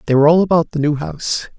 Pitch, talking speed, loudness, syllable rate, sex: 155 Hz, 265 wpm, -16 LUFS, 7.3 syllables/s, male